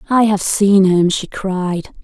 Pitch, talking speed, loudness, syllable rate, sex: 195 Hz, 175 wpm, -15 LUFS, 3.4 syllables/s, female